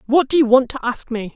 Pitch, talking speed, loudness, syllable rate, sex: 250 Hz, 310 wpm, -17 LUFS, 6.0 syllables/s, female